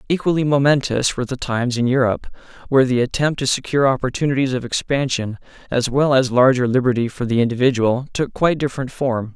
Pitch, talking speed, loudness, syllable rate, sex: 130 Hz, 175 wpm, -18 LUFS, 6.4 syllables/s, male